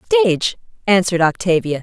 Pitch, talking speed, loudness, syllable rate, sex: 195 Hz, 100 wpm, -17 LUFS, 7.3 syllables/s, female